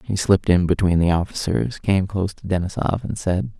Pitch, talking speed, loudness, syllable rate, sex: 95 Hz, 200 wpm, -21 LUFS, 5.5 syllables/s, male